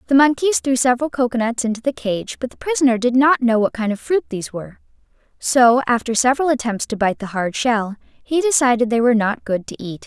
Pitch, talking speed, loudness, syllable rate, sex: 240 Hz, 220 wpm, -18 LUFS, 6.0 syllables/s, female